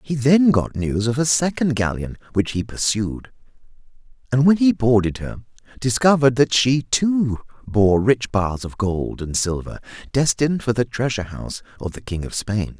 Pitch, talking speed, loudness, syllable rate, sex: 120 Hz, 175 wpm, -20 LUFS, 4.8 syllables/s, male